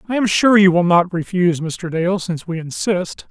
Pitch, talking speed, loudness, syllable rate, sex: 180 Hz, 200 wpm, -17 LUFS, 5.1 syllables/s, male